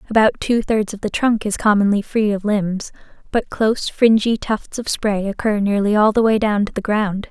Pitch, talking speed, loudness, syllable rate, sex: 210 Hz, 215 wpm, -18 LUFS, 5.0 syllables/s, female